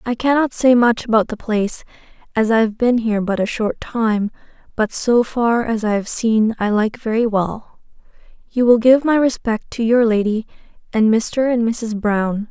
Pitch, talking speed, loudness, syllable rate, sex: 225 Hz, 190 wpm, -17 LUFS, 4.6 syllables/s, female